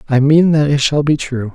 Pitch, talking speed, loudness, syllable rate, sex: 140 Hz, 270 wpm, -13 LUFS, 5.1 syllables/s, male